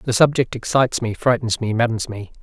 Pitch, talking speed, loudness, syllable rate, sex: 125 Hz, 200 wpm, -19 LUFS, 5.6 syllables/s, female